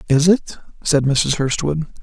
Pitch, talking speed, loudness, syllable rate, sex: 150 Hz, 150 wpm, -18 LUFS, 4.0 syllables/s, male